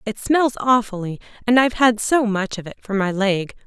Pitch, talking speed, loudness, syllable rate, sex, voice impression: 220 Hz, 215 wpm, -19 LUFS, 5.2 syllables/s, female, feminine, adult-like, tensed, powerful, bright, clear, fluent, intellectual, friendly, elegant, lively, slightly strict, slightly sharp